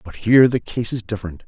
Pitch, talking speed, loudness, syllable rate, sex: 110 Hz, 245 wpm, -18 LUFS, 6.6 syllables/s, male